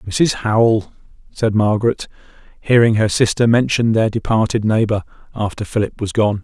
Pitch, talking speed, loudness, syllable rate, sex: 110 Hz, 140 wpm, -16 LUFS, 5.0 syllables/s, male